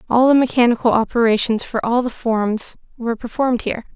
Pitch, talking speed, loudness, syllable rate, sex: 235 Hz, 165 wpm, -18 LUFS, 6.1 syllables/s, female